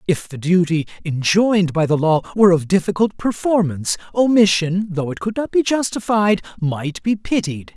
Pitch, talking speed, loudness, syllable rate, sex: 185 Hz, 160 wpm, -18 LUFS, 5.1 syllables/s, male